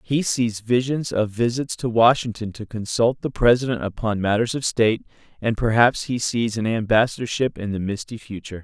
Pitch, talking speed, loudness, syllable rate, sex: 115 Hz, 175 wpm, -21 LUFS, 5.3 syllables/s, male